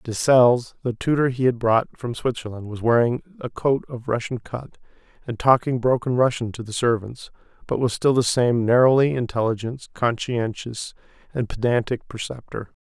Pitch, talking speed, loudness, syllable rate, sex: 120 Hz, 155 wpm, -22 LUFS, 5.0 syllables/s, male